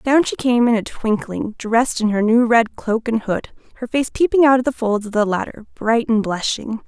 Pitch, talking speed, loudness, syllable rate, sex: 230 Hz, 235 wpm, -18 LUFS, 5.0 syllables/s, female